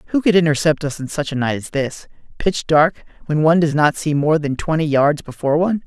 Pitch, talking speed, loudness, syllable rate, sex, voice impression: 155 Hz, 235 wpm, -18 LUFS, 5.9 syllables/s, male, slightly masculine, slightly feminine, very gender-neutral, slightly adult-like, slightly middle-aged, slightly thick, slightly tensed, slightly weak, slightly dark, slightly hard, muffled, slightly halting, slightly cool, intellectual, slightly refreshing, sincere, slightly calm, slightly friendly, slightly reassuring, unique, slightly elegant, sweet, slightly lively, kind, very modest